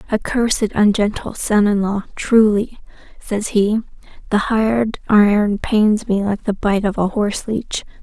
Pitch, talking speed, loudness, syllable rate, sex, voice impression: 210 Hz, 155 wpm, -17 LUFS, 4.2 syllables/s, female, feminine, slightly adult-like, slightly weak, slightly dark, calm, reassuring